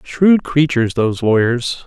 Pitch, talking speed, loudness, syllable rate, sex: 135 Hz, 130 wpm, -15 LUFS, 4.4 syllables/s, male